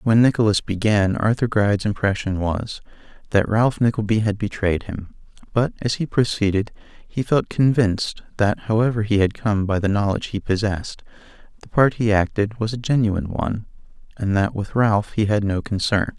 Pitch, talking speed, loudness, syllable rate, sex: 105 Hz, 170 wpm, -21 LUFS, 5.2 syllables/s, male